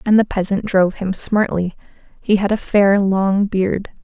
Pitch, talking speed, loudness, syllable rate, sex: 195 Hz, 180 wpm, -17 LUFS, 4.4 syllables/s, female